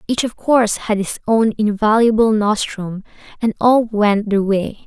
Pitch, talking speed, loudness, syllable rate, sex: 215 Hz, 160 wpm, -16 LUFS, 4.3 syllables/s, female